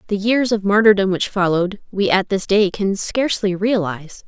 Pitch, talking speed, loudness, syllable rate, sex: 200 Hz, 180 wpm, -18 LUFS, 5.3 syllables/s, female